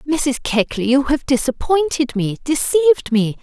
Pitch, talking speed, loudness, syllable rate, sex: 250 Hz, 125 wpm, -17 LUFS, 4.9 syllables/s, female